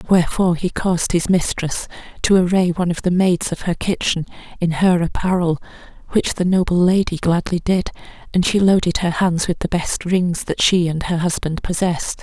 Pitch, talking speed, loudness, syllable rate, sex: 175 Hz, 185 wpm, -18 LUFS, 5.3 syllables/s, female